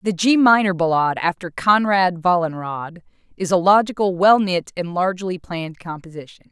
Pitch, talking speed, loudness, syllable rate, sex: 180 Hz, 145 wpm, -18 LUFS, 5.1 syllables/s, female